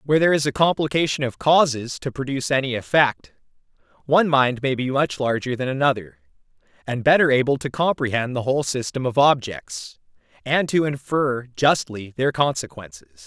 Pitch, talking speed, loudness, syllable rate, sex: 130 Hz, 160 wpm, -21 LUFS, 5.4 syllables/s, male